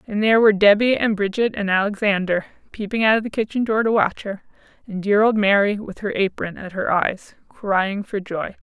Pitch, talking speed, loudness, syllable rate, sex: 205 Hz, 205 wpm, -19 LUFS, 5.3 syllables/s, female